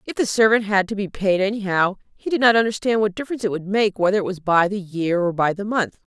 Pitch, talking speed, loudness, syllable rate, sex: 200 Hz, 265 wpm, -20 LUFS, 6.3 syllables/s, female